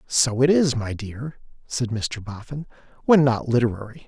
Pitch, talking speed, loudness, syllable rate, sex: 125 Hz, 160 wpm, -22 LUFS, 4.6 syllables/s, male